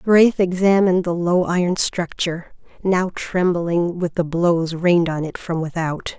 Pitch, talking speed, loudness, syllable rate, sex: 175 Hz, 155 wpm, -19 LUFS, 4.3 syllables/s, female